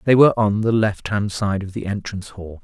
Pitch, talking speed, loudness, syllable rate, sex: 105 Hz, 250 wpm, -20 LUFS, 5.6 syllables/s, male